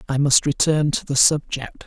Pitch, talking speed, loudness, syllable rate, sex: 140 Hz, 195 wpm, -18 LUFS, 4.7 syllables/s, male